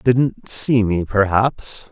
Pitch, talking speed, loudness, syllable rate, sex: 110 Hz, 125 wpm, -18 LUFS, 2.8 syllables/s, male